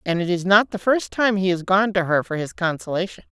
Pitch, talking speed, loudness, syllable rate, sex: 185 Hz, 270 wpm, -21 LUFS, 5.7 syllables/s, female